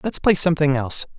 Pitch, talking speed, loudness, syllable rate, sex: 155 Hz, 200 wpm, -19 LUFS, 7.1 syllables/s, male